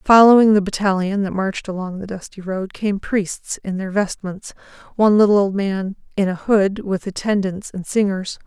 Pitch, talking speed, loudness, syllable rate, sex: 195 Hz, 170 wpm, -19 LUFS, 5.0 syllables/s, female